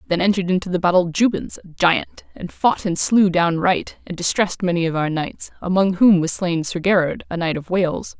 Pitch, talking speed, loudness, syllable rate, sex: 180 Hz, 220 wpm, -19 LUFS, 5.4 syllables/s, female